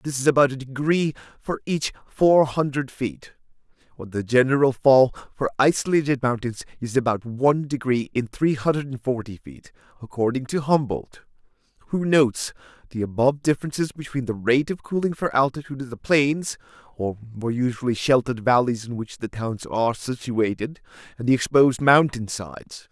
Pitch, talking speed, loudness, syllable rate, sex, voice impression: 130 Hz, 150 wpm, -22 LUFS, 5.3 syllables/s, male, very masculine, very middle-aged, very thick, tensed, powerful, bright, slightly hard, clear, fluent, cool, intellectual, refreshing, very sincere, calm, mature, friendly, very reassuring, slightly unique, slightly elegant, wild, sweet, lively, slightly strict, slightly intense